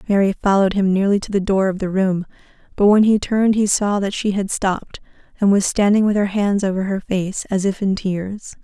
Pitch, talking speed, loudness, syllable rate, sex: 195 Hz, 230 wpm, -18 LUFS, 5.5 syllables/s, female